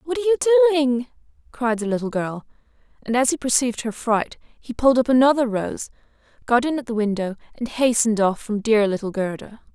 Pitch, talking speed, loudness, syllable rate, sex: 245 Hz, 190 wpm, -21 LUFS, 5.8 syllables/s, female